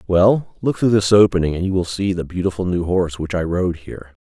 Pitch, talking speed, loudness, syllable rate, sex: 90 Hz, 240 wpm, -18 LUFS, 5.8 syllables/s, male